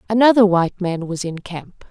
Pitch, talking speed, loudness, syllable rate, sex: 190 Hz, 190 wpm, -17 LUFS, 5.3 syllables/s, female